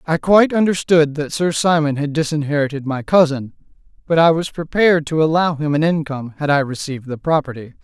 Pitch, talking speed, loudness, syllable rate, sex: 155 Hz, 185 wpm, -17 LUFS, 6.0 syllables/s, male